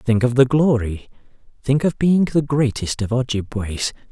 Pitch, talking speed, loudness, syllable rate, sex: 125 Hz, 160 wpm, -19 LUFS, 4.6 syllables/s, male